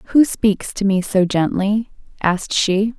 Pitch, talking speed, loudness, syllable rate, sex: 200 Hz, 160 wpm, -18 LUFS, 3.8 syllables/s, female